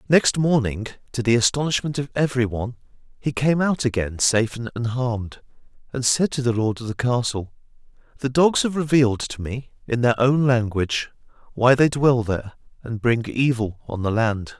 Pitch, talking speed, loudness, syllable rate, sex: 120 Hz, 175 wpm, -21 LUFS, 5.2 syllables/s, male